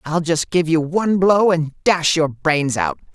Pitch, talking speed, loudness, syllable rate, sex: 160 Hz, 210 wpm, -17 LUFS, 4.2 syllables/s, male